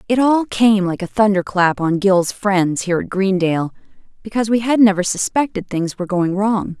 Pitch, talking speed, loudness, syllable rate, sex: 200 Hz, 185 wpm, -17 LUFS, 5.2 syllables/s, female